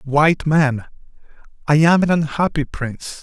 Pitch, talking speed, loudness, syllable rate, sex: 150 Hz, 130 wpm, -17 LUFS, 4.7 syllables/s, male